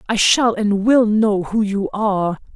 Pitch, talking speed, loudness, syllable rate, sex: 210 Hz, 190 wpm, -17 LUFS, 4.0 syllables/s, female